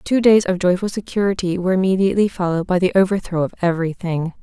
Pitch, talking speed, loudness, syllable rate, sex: 185 Hz, 205 wpm, -18 LUFS, 7.0 syllables/s, female